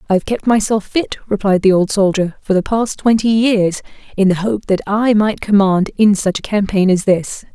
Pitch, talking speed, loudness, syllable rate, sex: 205 Hz, 215 wpm, -15 LUFS, 4.9 syllables/s, female